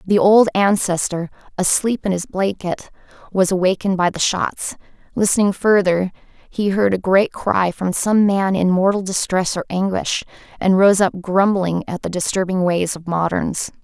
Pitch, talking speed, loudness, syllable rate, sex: 190 Hz, 160 wpm, -18 LUFS, 4.5 syllables/s, female